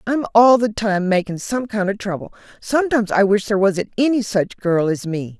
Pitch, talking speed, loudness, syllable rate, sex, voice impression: 205 Hz, 210 wpm, -18 LUFS, 5.3 syllables/s, female, feminine, adult-like, tensed, powerful, bright, fluent, intellectual, slightly calm, friendly, unique, lively, slightly strict